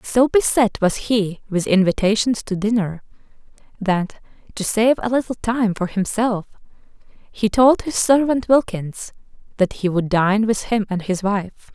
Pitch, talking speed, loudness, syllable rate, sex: 215 Hz, 155 wpm, -19 LUFS, 4.2 syllables/s, female